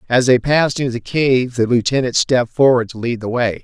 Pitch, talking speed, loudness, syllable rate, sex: 125 Hz, 230 wpm, -16 LUFS, 5.8 syllables/s, male